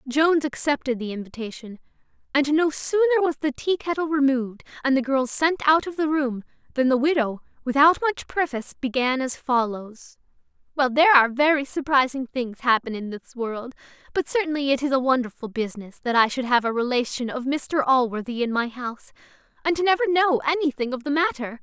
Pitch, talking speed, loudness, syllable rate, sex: 270 Hz, 180 wpm, -23 LUFS, 5.6 syllables/s, female